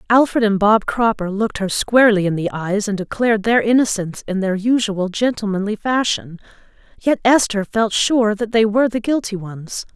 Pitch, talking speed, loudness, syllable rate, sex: 215 Hz, 175 wpm, -18 LUFS, 5.2 syllables/s, female